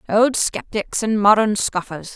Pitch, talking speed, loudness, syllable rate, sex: 215 Hz, 140 wpm, -18 LUFS, 4.1 syllables/s, female